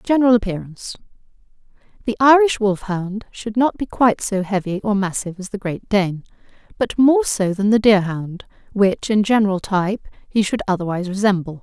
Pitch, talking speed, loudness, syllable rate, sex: 205 Hz, 155 wpm, -19 LUFS, 5.4 syllables/s, female